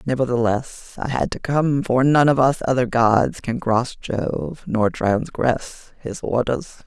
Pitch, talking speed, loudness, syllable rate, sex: 125 Hz, 155 wpm, -20 LUFS, 3.9 syllables/s, female